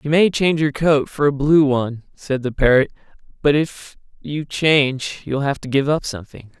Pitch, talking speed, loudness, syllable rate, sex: 140 Hz, 200 wpm, -18 LUFS, 5.1 syllables/s, male